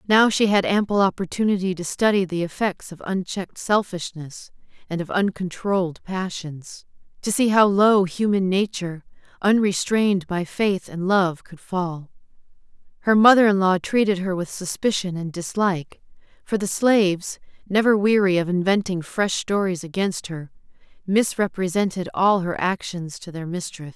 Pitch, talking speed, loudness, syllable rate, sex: 190 Hz, 145 wpm, -21 LUFS, 4.7 syllables/s, female